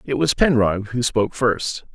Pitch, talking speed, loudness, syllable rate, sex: 115 Hz, 185 wpm, -20 LUFS, 4.7 syllables/s, male